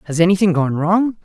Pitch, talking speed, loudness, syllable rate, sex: 180 Hz, 195 wpm, -16 LUFS, 5.8 syllables/s, female